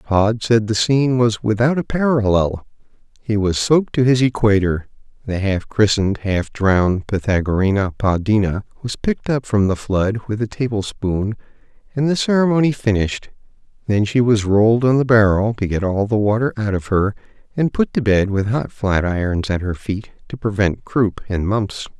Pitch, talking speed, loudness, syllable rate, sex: 110 Hz, 175 wpm, -18 LUFS, 5.0 syllables/s, male